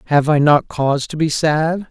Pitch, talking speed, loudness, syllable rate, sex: 150 Hz, 220 wpm, -16 LUFS, 4.8 syllables/s, male